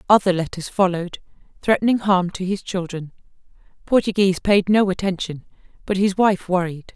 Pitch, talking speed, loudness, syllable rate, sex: 190 Hz, 140 wpm, -20 LUFS, 5.5 syllables/s, female